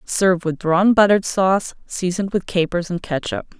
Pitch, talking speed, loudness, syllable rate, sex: 185 Hz, 165 wpm, -19 LUFS, 5.1 syllables/s, female